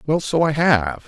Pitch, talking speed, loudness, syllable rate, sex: 145 Hz, 220 wpm, -18 LUFS, 4.3 syllables/s, male